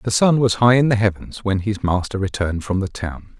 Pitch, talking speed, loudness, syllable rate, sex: 105 Hz, 245 wpm, -19 LUFS, 5.7 syllables/s, male